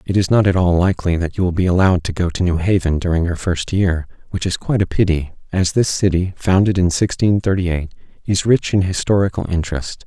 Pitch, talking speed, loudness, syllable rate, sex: 90 Hz, 225 wpm, -17 LUFS, 6.0 syllables/s, male